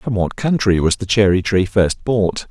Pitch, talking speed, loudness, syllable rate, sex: 100 Hz, 215 wpm, -16 LUFS, 4.5 syllables/s, male